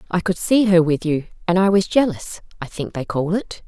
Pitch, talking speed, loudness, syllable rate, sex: 185 Hz, 230 wpm, -19 LUFS, 5.2 syllables/s, female